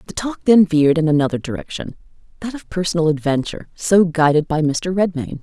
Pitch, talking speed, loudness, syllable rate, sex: 165 Hz, 165 wpm, -17 LUFS, 6.0 syllables/s, female